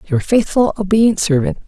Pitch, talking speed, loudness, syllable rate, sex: 225 Hz, 145 wpm, -15 LUFS, 5.7 syllables/s, female